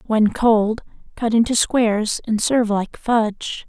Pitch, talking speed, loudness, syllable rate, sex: 220 Hz, 145 wpm, -19 LUFS, 4.1 syllables/s, female